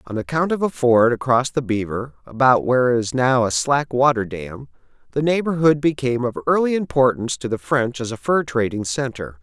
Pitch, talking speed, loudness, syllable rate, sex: 125 Hz, 190 wpm, -19 LUFS, 5.3 syllables/s, male